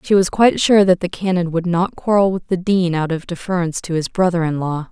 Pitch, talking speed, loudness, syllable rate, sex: 180 Hz, 255 wpm, -17 LUFS, 5.8 syllables/s, female